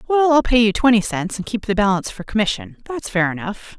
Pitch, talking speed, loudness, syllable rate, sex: 215 Hz, 240 wpm, -19 LUFS, 6.0 syllables/s, female